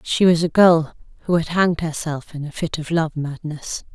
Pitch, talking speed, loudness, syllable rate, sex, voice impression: 160 Hz, 215 wpm, -20 LUFS, 4.9 syllables/s, female, feminine, slightly middle-aged, slightly powerful, clear, slightly halting, intellectual, calm, elegant, slightly strict, sharp